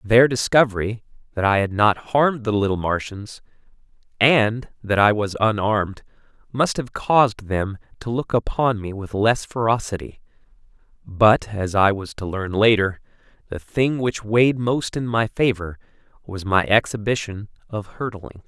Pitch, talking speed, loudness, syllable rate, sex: 110 Hz, 150 wpm, -20 LUFS, 4.5 syllables/s, male